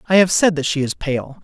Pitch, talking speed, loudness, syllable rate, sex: 160 Hz, 290 wpm, -17 LUFS, 5.4 syllables/s, male